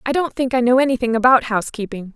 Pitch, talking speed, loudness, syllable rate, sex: 245 Hz, 225 wpm, -17 LUFS, 6.8 syllables/s, female